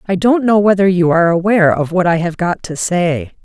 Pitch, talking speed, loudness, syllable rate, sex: 180 Hz, 245 wpm, -13 LUFS, 5.5 syllables/s, female